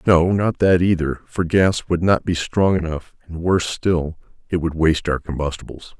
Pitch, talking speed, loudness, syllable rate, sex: 85 Hz, 190 wpm, -19 LUFS, 4.8 syllables/s, male